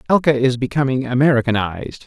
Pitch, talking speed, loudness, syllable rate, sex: 130 Hz, 115 wpm, -17 LUFS, 6.4 syllables/s, male